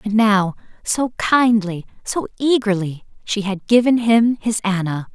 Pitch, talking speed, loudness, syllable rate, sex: 215 Hz, 130 wpm, -18 LUFS, 4.1 syllables/s, female